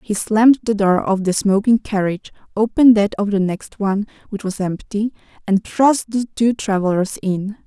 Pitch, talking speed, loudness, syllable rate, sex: 210 Hz, 180 wpm, -18 LUFS, 5.0 syllables/s, female